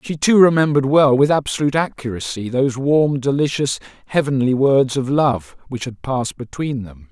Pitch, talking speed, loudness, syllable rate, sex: 135 Hz, 160 wpm, -18 LUFS, 5.3 syllables/s, male